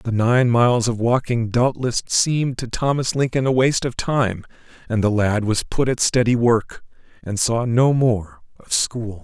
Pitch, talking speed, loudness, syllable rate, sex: 120 Hz, 180 wpm, -19 LUFS, 4.4 syllables/s, male